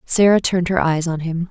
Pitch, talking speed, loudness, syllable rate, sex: 170 Hz, 240 wpm, -17 LUFS, 5.7 syllables/s, female